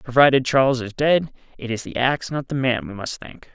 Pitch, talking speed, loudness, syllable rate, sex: 130 Hz, 235 wpm, -21 LUFS, 5.7 syllables/s, male